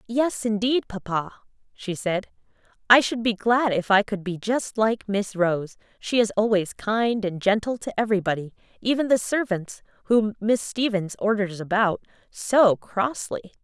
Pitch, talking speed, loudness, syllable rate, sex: 210 Hz, 155 wpm, -23 LUFS, 4.4 syllables/s, female